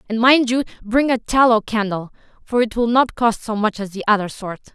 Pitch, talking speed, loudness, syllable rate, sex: 225 Hz, 230 wpm, -18 LUFS, 5.4 syllables/s, female